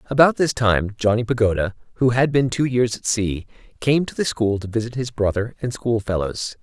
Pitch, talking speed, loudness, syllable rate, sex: 115 Hz, 200 wpm, -21 LUFS, 5.2 syllables/s, male